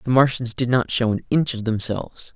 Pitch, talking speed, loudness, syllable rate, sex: 120 Hz, 230 wpm, -21 LUFS, 5.6 syllables/s, male